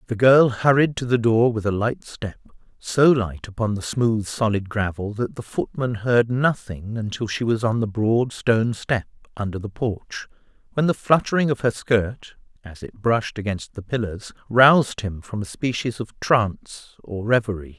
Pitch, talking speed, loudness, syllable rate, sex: 115 Hz, 180 wpm, -22 LUFS, 4.6 syllables/s, male